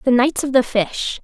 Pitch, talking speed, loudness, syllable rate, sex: 255 Hz, 245 wpm, -18 LUFS, 4.5 syllables/s, female